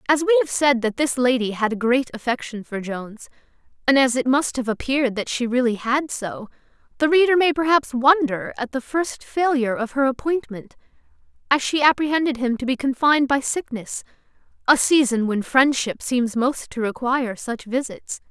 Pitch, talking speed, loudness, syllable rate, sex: 260 Hz, 180 wpm, -21 LUFS, 5.3 syllables/s, female